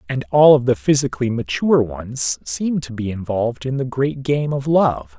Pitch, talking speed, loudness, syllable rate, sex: 125 Hz, 195 wpm, -18 LUFS, 4.9 syllables/s, male